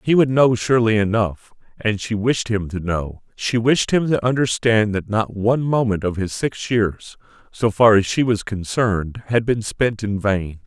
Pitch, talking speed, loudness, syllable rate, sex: 110 Hz, 195 wpm, -19 LUFS, 4.5 syllables/s, male